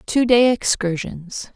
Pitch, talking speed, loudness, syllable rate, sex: 215 Hz, 115 wpm, -18 LUFS, 3.5 syllables/s, female